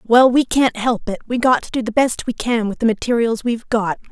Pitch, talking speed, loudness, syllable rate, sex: 235 Hz, 260 wpm, -18 LUFS, 5.5 syllables/s, female